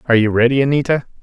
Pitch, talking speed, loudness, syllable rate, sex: 125 Hz, 195 wpm, -15 LUFS, 8.2 syllables/s, male